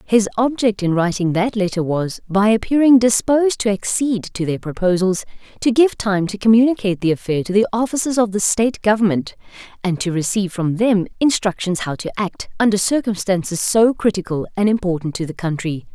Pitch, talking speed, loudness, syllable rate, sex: 205 Hz, 175 wpm, -18 LUFS, 5.6 syllables/s, female